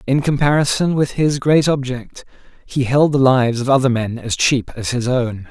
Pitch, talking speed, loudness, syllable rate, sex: 130 Hz, 195 wpm, -17 LUFS, 4.8 syllables/s, male